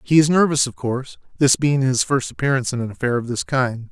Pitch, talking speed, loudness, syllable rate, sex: 130 Hz, 245 wpm, -19 LUFS, 6.1 syllables/s, male